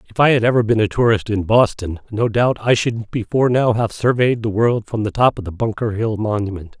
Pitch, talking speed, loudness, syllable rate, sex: 110 Hz, 240 wpm, -18 LUFS, 5.6 syllables/s, male